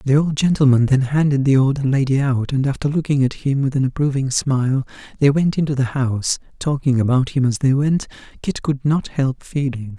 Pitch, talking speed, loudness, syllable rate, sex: 135 Hz, 200 wpm, -18 LUFS, 5.3 syllables/s, male